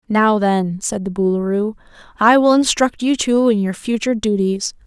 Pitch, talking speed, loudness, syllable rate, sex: 215 Hz, 175 wpm, -17 LUFS, 4.8 syllables/s, female